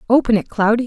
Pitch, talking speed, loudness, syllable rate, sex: 225 Hz, 205 wpm, -17 LUFS, 6.8 syllables/s, female